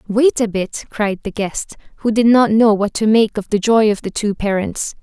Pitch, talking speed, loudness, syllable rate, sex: 215 Hz, 240 wpm, -16 LUFS, 4.7 syllables/s, female